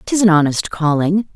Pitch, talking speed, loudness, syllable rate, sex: 175 Hz, 175 wpm, -15 LUFS, 4.9 syllables/s, female